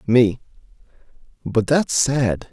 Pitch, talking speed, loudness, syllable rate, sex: 120 Hz, 95 wpm, -19 LUFS, 3.0 syllables/s, male